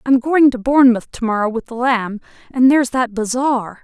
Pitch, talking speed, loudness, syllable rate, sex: 245 Hz, 190 wpm, -16 LUFS, 5.3 syllables/s, female